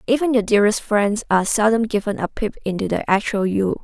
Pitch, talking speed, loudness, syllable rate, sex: 210 Hz, 205 wpm, -19 LUFS, 5.9 syllables/s, female